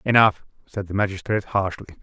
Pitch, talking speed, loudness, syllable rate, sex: 100 Hz, 150 wpm, -22 LUFS, 6.4 syllables/s, male